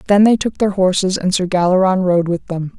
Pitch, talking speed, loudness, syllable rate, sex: 185 Hz, 235 wpm, -15 LUFS, 5.6 syllables/s, female